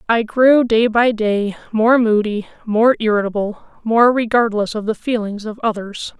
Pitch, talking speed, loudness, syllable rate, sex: 220 Hz, 155 wpm, -16 LUFS, 4.5 syllables/s, female